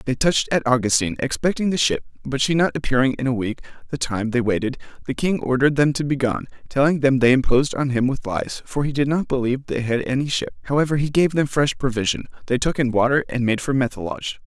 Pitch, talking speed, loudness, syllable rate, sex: 135 Hz, 230 wpm, -21 LUFS, 6.4 syllables/s, male